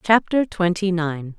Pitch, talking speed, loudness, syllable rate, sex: 180 Hz, 130 wpm, -21 LUFS, 3.9 syllables/s, female